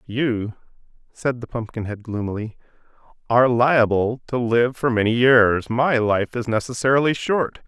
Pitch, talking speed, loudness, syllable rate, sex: 120 Hz, 135 wpm, -20 LUFS, 4.5 syllables/s, male